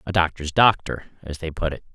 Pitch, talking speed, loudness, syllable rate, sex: 85 Hz, 215 wpm, -22 LUFS, 5.7 syllables/s, male